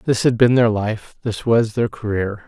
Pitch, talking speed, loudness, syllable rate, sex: 110 Hz, 220 wpm, -18 LUFS, 4.5 syllables/s, male